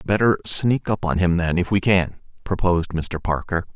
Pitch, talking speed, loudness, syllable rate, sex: 90 Hz, 190 wpm, -21 LUFS, 4.9 syllables/s, male